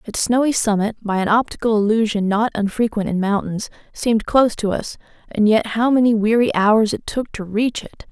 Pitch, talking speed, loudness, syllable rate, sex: 220 Hz, 190 wpm, -18 LUFS, 5.3 syllables/s, female